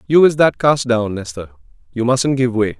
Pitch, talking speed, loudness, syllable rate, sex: 130 Hz, 215 wpm, -16 LUFS, 5.1 syllables/s, male